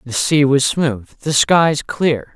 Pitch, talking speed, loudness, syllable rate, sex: 140 Hz, 180 wpm, -16 LUFS, 3.1 syllables/s, male